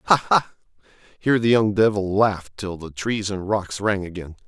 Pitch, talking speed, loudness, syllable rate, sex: 100 Hz, 175 wpm, -21 LUFS, 4.4 syllables/s, male